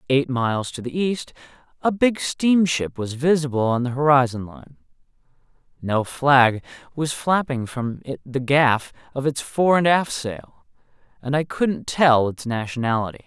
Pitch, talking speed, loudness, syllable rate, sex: 135 Hz, 150 wpm, -21 LUFS, 4.3 syllables/s, male